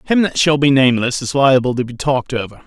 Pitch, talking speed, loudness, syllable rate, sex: 135 Hz, 250 wpm, -15 LUFS, 6.3 syllables/s, male